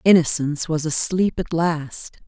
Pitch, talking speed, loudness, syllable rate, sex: 160 Hz, 130 wpm, -20 LUFS, 4.4 syllables/s, female